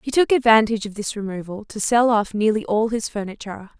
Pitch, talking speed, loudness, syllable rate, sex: 215 Hz, 205 wpm, -20 LUFS, 6.1 syllables/s, female